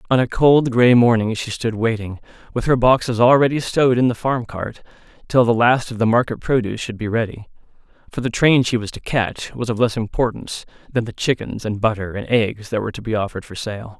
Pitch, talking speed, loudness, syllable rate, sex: 115 Hz, 225 wpm, -19 LUFS, 5.8 syllables/s, male